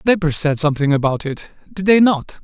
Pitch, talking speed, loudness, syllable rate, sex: 165 Hz, 220 wpm, -16 LUFS, 6.1 syllables/s, male